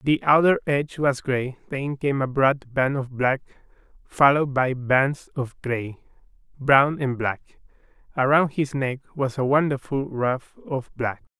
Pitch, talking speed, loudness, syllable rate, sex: 135 Hz, 155 wpm, -23 LUFS, 4.2 syllables/s, male